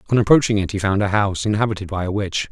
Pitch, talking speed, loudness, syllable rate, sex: 100 Hz, 265 wpm, -19 LUFS, 7.5 syllables/s, male